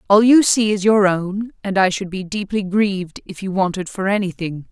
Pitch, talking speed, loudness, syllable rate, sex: 195 Hz, 230 wpm, -18 LUFS, 5.0 syllables/s, female